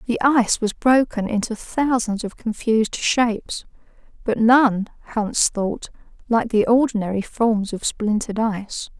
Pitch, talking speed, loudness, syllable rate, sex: 225 Hz, 135 wpm, -20 LUFS, 4.4 syllables/s, female